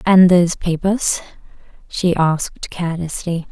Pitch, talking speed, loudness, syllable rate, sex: 175 Hz, 100 wpm, -17 LUFS, 4.4 syllables/s, female